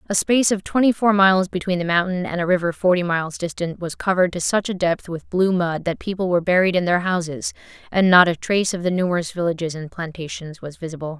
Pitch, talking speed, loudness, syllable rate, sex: 175 Hz, 230 wpm, -20 LUFS, 6.3 syllables/s, female